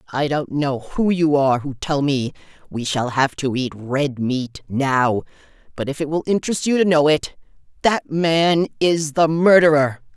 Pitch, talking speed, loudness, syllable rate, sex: 150 Hz, 170 wpm, -19 LUFS, 4.4 syllables/s, female